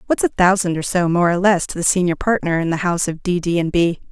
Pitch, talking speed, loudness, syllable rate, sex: 180 Hz, 290 wpm, -18 LUFS, 6.3 syllables/s, female